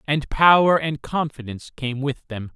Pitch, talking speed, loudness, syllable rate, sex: 140 Hz, 165 wpm, -20 LUFS, 4.8 syllables/s, male